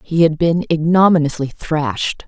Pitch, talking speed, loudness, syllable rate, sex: 160 Hz, 130 wpm, -16 LUFS, 4.7 syllables/s, female